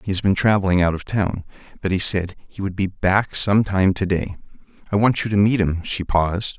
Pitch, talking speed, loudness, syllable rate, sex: 95 Hz, 235 wpm, -20 LUFS, 5.3 syllables/s, male